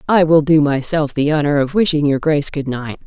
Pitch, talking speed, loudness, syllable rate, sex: 150 Hz, 235 wpm, -16 LUFS, 5.6 syllables/s, female